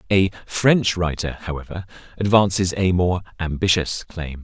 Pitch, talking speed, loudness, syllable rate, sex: 90 Hz, 120 wpm, -20 LUFS, 4.6 syllables/s, male